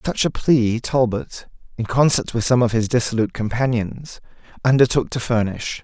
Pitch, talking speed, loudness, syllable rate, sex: 120 Hz, 155 wpm, -19 LUFS, 5.0 syllables/s, male